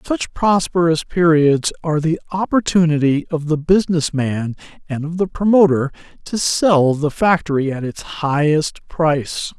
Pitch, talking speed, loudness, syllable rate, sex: 160 Hz, 140 wpm, -17 LUFS, 4.5 syllables/s, male